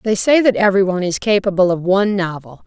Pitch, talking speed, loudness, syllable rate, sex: 195 Hz, 205 wpm, -15 LUFS, 6.2 syllables/s, female